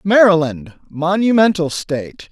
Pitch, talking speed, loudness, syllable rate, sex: 180 Hz, 80 wpm, -15 LUFS, 4.3 syllables/s, male